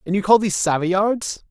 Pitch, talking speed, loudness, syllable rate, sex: 195 Hz, 200 wpm, -19 LUFS, 5.2 syllables/s, male